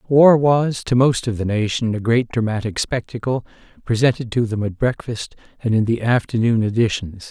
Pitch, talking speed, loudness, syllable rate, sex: 115 Hz, 170 wpm, -19 LUFS, 5.1 syllables/s, male